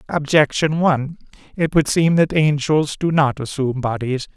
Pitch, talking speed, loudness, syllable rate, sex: 145 Hz, 150 wpm, -18 LUFS, 4.8 syllables/s, male